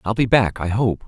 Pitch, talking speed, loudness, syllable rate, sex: 105 Hz, 225 wpm, -19 LUFS, 5.2 syllables/s, male